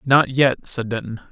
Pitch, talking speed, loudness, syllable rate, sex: 125 Hz, 185 wpm, -20 LUFS, 4.7 syllables/s, male